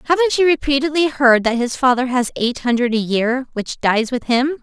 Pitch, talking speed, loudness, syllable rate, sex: 260 Hz, 210 wpm, -17 LUFS, 5.2 syllables/s, female